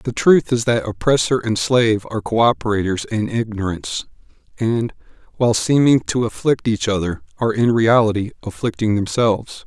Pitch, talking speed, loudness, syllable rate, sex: 115 Hz, 150 wpm, -18 LUFS, 5.4 syllables/s, male